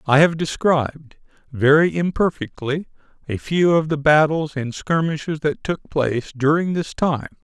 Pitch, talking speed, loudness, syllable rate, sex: 150 Hz, 145 wpm, -20 LUFS, 4.4 syllables/s, male